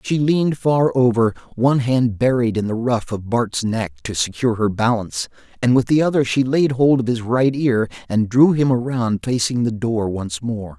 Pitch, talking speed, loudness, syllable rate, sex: 120 Hz, 205 wpm, -19 LUFS, 4.9 syllables/s, male